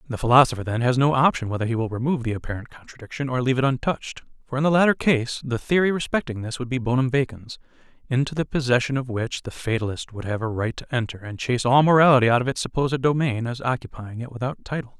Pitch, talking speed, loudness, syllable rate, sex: 125 Hz, 230 wpm, -22 LUFS, 6.8 syllables/s, male